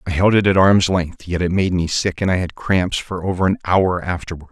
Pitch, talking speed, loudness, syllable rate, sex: 95 Hz, 265 wpm, -18 LUFS, 5.4 syllables/s, male